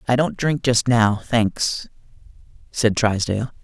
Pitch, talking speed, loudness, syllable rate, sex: 115 Hz, 130 wpm, -20 LUFS, 3.9 syllables/s, male